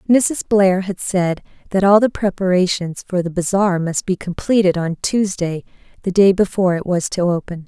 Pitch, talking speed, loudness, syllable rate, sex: 185 Hz, 180 wpm, -17 LUFS, 4.9 syllables/s, female